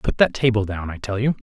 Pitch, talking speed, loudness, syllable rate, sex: 110 Hz, 285 wpm, -21 LUFS, 5.9 syllables/s, male